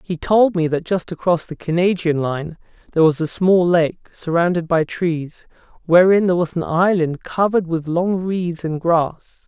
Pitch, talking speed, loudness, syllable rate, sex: 170 Hz, 175 wpm, -18 LUFS, 4.6 syllables/s, male